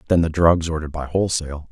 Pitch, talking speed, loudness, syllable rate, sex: 80 Hz, 210 wpm, -20 LUFS, 7.3 syllables/s, male